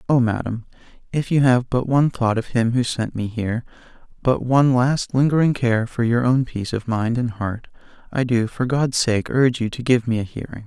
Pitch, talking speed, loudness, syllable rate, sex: 120 Hz, 220 wpm, -20 LUFS, 5.3 syllables/s, male